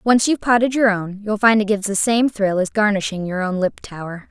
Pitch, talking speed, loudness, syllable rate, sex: 205 Hz, 235 wpm, -18 LUFS, 5.5 syllables/s, female